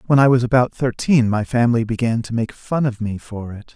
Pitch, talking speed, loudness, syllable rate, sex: 115 Hz, 240 wpm, -18 LUFS, 5.6 syllables/s, male